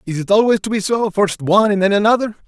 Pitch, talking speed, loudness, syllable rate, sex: 205 Hz, 245 wpm, -16 LUFS, 6.6 syllables/s, male